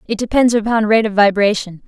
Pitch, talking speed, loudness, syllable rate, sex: 215 Hz, 190 wpm, -14 LUFS, 5.8 syllables/s, female